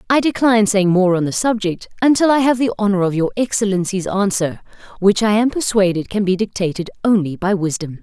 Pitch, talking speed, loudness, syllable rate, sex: 200 Hz, 195 wpm, -17 LUFS, 5.8 syllables/s, female